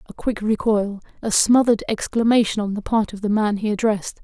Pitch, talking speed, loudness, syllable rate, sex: 215 Hz, 200 wpm, -20 LUFS, 5.7 syllables/s, female